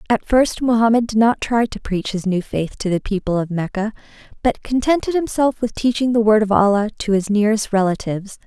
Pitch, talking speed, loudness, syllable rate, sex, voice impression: 220 Hz, 205 wpm, -18 LUFS, 5.6 syllables/s, female, very feminine, young, very thin, very tensed, powerful, very bright, soft, very clear, fluent, very cute, intellectual, very refreshing, sincere, slightly calm, very friendly, very reassuring, very unique, slightly elegant, slightly wild, very sweet, slightly strict, intense, slightly sharp, light